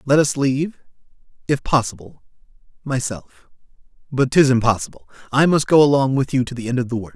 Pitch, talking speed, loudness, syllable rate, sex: 130 Hz, 160 wpm, -19 LUFS, 5.9 syllables/s, male